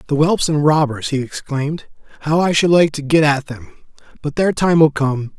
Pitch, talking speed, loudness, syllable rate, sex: 150 Hz, 210 wpm, -16 LUFS, 5.1 syllables/s, male